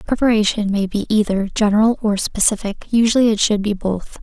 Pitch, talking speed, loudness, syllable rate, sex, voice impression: 210 Hz, 170 wpm, -17 LUFS, 5.5 syllables/s, female, very feminine, young, very thin, very tensed, slightly powerful, very bright, soft, very clear, very fluent, very cute, intellectual, very refreshing, sincere, very calm, very friendly, very reassuring, unique, elegant, slightly wild, very sweet, lively